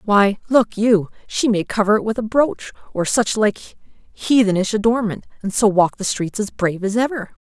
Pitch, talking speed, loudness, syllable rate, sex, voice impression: 210 Hz, 195 wpm, -18 LUFS, 4.9 syllables/s, female, very feminine, adult-like, middle-aged, slightly thick, tensed, powerful, slightly bright, hard, clear, fluent, slightly cool, intellectual, slightly refreshing, sincere, calm, slightly reassuring, strict, slightly sharp